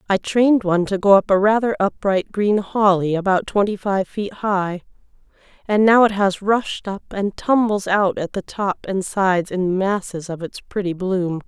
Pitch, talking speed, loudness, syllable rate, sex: 195 Hz, 190 wpm, -19 LUFS, 4.6 syllables/s, female